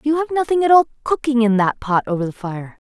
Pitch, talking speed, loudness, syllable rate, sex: 255 Hz, 250 wpm, -18 LUFS, 6.0 syllables/s, female